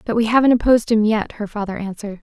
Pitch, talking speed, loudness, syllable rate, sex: 220 Hz, 235 wpm, -18 LUFS, 7.1 syllables/s, female